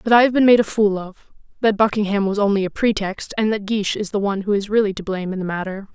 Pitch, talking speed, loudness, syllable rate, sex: 205 Hz, 285 wpm, -19 LUFS, 6.7 syllables/s, female